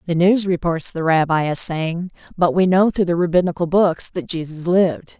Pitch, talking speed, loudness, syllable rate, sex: 170 Hz, 195 wpm, -18 LUFS, 5.1 syllables/s, female